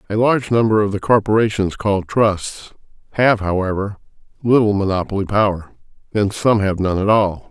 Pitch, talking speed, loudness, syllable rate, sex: 105 Hz, 150 wpm, -17 LUFS, 5.4 syllables/s, male